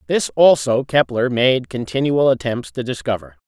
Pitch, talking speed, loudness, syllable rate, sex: 125 Hz, 140 wpm, -18 LUFS, 4.6 syllables/s, male